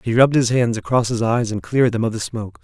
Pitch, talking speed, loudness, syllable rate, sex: 115 Hz, 295 wpm, -19 LUFS, 6.7 syllables/s, male